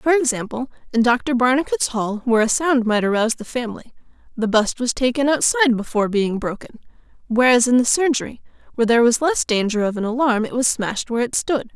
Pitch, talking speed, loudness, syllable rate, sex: 245 Hz, 200 wpm, -19 LUFS, 6.2 syllables/s, female